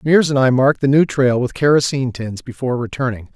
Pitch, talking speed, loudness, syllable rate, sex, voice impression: 130 Hz, 215 wpm, -17 LUFS, 6.4 syllables/s, male, masculine, middle-aged, thick, powerful, slightly hard, slightly muffled, cool, intellectual, sincere, calm, mature, friendly, reassuring, wild, slightly strict